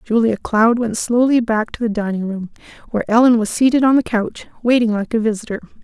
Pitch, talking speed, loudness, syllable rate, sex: 225 Hz, 205 wpm, -17 LUFS, 5.9 syllables/s, female